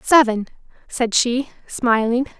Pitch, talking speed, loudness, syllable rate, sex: 240 Hz, 100 wpm, -19 LUFS, 3.7 syllables/s, female